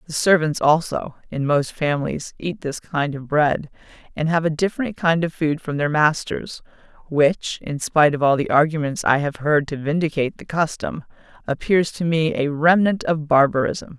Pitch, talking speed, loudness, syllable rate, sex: 155 Hz, 180 wpm, -20 LUFS, 4.9 syllables/s, female